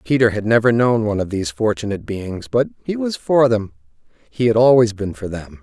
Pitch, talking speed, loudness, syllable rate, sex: 110 Hz, 205 wpm, -18 LUFS, 5.7 syllables/s, male